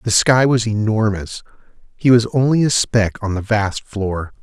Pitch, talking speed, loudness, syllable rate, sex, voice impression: 110 Hz, 175 wpm, -17 LUFS, 4.3 syllables/s, male, masculine, adult-like, slightly thick, slightly hard, fluent, slightly raspy, intellectual, sincere, calm, slightly friendly, wild, lively, kind, modest